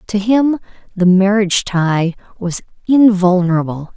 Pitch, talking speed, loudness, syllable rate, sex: 195 Hz, 105 wpm, -14 LUFS, 4.4 syllables/s, female